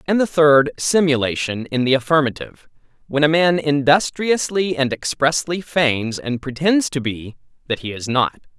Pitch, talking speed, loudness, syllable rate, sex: 145 Hz, 155 wpm, -18 LUFS, 4.7 syllables/s, male